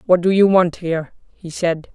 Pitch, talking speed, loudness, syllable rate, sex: 175 Hz, 215 wpm, -17 LUFS, 4.9 syllables/s, female